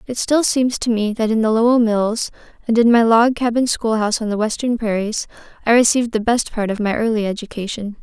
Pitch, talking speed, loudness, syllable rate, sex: 225 Hz, 215 wpm, -17 LUFS, 5.7 syllables/s, female